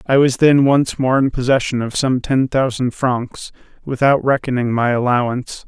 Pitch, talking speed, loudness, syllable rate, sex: 130 Hz, 170 wpm, -16 LUFS, 4.8 syllables/s, male